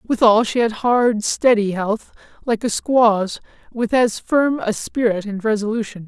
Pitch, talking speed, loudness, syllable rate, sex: 225 Hz, 160 wpm, -18 LUFS, 4.1 syllables/s, male